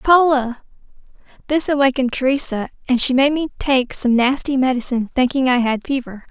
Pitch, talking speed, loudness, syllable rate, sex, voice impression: 260 Hz, 150 wpm, -18 LUFS, 5.6 syllables/s, female, feminine, slightly young, tensed, bright, clear, slightly nasal, cute, friendly, slightly sweet, lively, kind